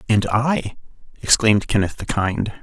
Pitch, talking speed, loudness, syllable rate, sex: 110 Hz, 135 wpm, -19 LUFS, 4.6 syllables/s, male